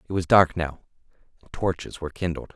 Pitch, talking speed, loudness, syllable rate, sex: 85 Hz, 190 wpm, -24 LUFS, 6.0 syllables/s, male